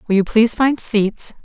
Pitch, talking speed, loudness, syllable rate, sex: 220 Hz, 210 wpm, -16 LUFS, 5.0 syllables/s, female